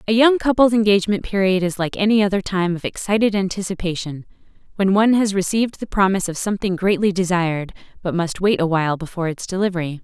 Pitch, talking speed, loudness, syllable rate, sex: 190 Hz, 180 wpm, -19 LUFS, 6.6 syllables/s, female